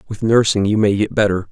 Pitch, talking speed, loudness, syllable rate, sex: 105 Hz, 235 wpm, -16 LUFS, 6.0 syllables/s, male